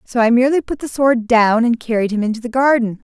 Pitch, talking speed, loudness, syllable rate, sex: 240 Hz, 250 wpm, -16 LUFS, 6.1 syllables/s, female